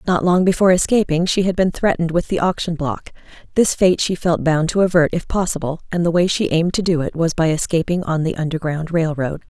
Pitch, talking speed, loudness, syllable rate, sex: 170 Hz, 230 wpm, -18 LUFS, 5.9 syllables/s, female